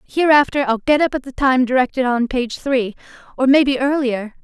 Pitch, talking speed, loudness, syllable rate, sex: 260 Hz, 190 wpm, -17 LUFS, 5.2 syllables/s, female